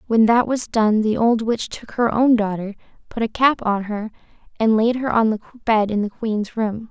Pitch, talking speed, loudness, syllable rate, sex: 220 Hz, 225 wpm, -19 LUFS, 4.8 syllables/s, female